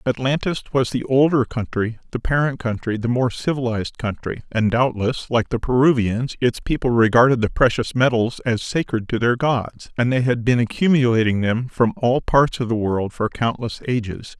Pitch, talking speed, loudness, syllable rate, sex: 120 Hz, 180 wpm, -20 LUFS, 5.0 syllables/s, male